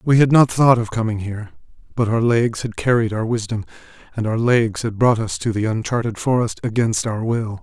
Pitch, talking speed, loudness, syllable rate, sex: 110 Hz, 210 wpm, -19 LUFS, 5.3 syllables/s, male